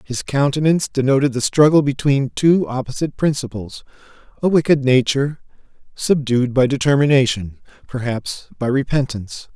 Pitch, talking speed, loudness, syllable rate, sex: 135 Hz, 105 wpm, -18 LUFS, 5.3 syllables/s, male